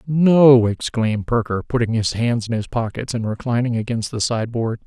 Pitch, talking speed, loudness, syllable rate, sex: 120 Hz, 175 wpm, -19 LUFS, 5.1 syllables/s, male